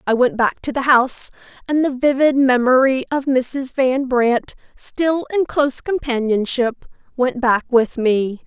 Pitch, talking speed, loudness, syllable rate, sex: 260 Hz, 155 wpm, -17 LUFS, 4.2 syllables/s, female